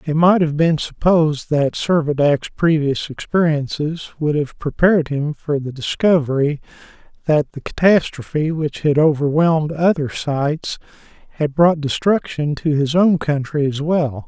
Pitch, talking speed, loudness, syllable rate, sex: 150 Hz, 140 wpm, -18 LUFS, 4.5 syllables/s, male